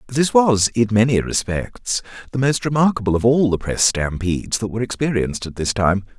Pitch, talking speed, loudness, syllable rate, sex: 115 Hz, 185 wpm, -19 LUFS, 5.4 syllables/s, male